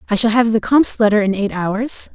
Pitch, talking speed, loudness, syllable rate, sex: 220 Hz, 250 wpm, -15 LUFS, 5.6 syllables/s, female